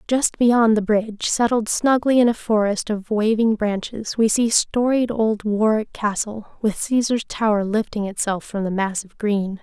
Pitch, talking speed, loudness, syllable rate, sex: 220 Hz, 175 wpm, -20 LUFS, 4.4 syllables/s, female